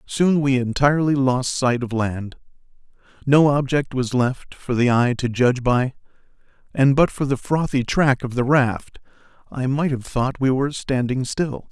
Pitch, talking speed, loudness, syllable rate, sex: 130 Hz, 175 wpm, -20 LUFS, 4.5 syllables/s, male